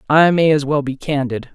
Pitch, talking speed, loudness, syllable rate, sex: 145 Hz, 235 wpm, -16 LUFS, 5.2 syllables/s, female